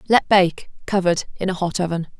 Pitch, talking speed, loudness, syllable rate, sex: 180 Hz, 190 wpm, -20 LUFS, 5.8 syllables/s, female